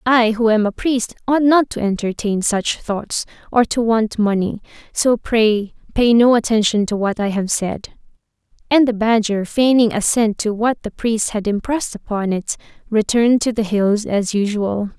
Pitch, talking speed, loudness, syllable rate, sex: 220 Hz, 175 wpm, -17 LUFS, 4.5 syllables/s, female